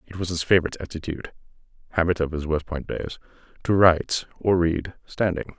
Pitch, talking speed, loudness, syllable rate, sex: 85 Hz, 150 wpm, -24 LUFS, 6.3 syllables/s, male